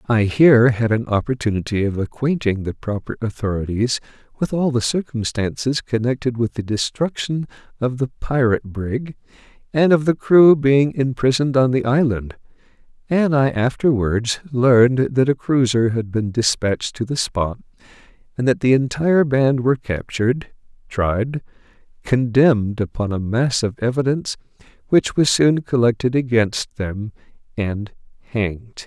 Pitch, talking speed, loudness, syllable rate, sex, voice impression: 125 Hz, 135 wpm, -19 LUFS, 4.7 syllables/s, male, masculine, middle-aged, relaxed, slightly weak, slightly dark, slightly muffled, sincere, calm, mature, slightly friendly, reassuring, kind, slightly modest